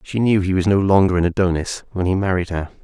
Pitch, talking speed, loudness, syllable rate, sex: 95 Hz, 255 wpm, -18 LUFS, 6.3 syllables/s, male